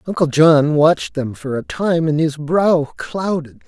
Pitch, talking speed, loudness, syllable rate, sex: 155 Hz, 180 wpm, -17 LUFS, 4.0 syllables/s, male